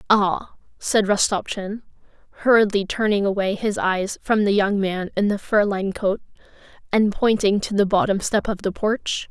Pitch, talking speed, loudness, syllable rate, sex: 205 Hz, 170 wpm, -21 LUFS, 4.7 syllables/s, female